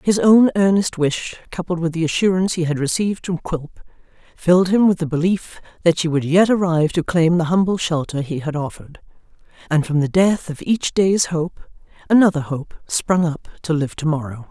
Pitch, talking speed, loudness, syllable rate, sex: 170 Hz, 195 wpm, -18 LUFS, 5.3 syllables/s, female